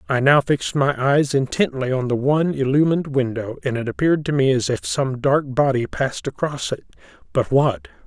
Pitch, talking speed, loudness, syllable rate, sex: 135 Hz, 195 wpm, -20 LUFS, 5.4 syllables/s, male